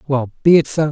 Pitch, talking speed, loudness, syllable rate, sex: 145 Hz, 265 wpm, -15 LUFS, 6.4 syllables/s, male